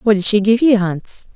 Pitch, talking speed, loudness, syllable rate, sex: 210 Hz, 265 wpm, -15 LUFS, 4.7 syllables/s, female